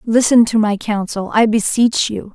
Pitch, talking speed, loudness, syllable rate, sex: 220 Hz, 180 wpm, -15 LUFS, 4.5 syllables/s, female